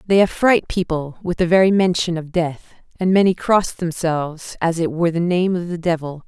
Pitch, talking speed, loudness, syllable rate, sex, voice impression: 175 Hz, 200 wpm, -19 LUFS, 5.2 syllables/s, female, very feminine, very adult-like, thin, tensed, powerful, bright, hard, clear, very fluent, cool, very intellectual, refreshing, sincere, very calm, very friendly, very reassuring, unique, very elegant, wild, sweet, slightly lively, kind, slightly sharp, slightly modest